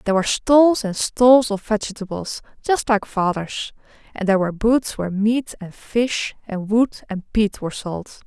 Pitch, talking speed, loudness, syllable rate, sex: 215 Hz, 175 wpm, -20 LUFS, 4.7 syllables/s, female